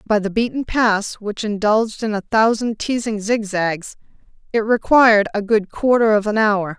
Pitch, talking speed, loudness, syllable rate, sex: 215 Hz, 170 wpm, -18 LUFS, 4.8 syllables/s, female